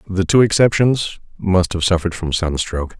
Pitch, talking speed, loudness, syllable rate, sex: 95 Hz, 160 wpm, -17 LUFS, 5.3 syllables/s, male